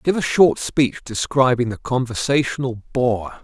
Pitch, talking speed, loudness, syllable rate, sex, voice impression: 125 Hz, 140 wpm, -19 LUFS, 4.4 syllables/s, male, masculine, adult-like, slightly powerful, cool, slightly sincere, slightly intense